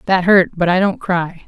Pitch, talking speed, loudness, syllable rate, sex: 180 Hz, 245 wpm, -15 LUFS, 4.7 syllables/s, female